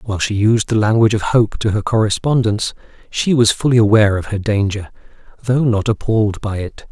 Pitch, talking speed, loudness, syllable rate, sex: 110 Hz, 190 wpm, -16 LUFS, 5.8 syllables/s, male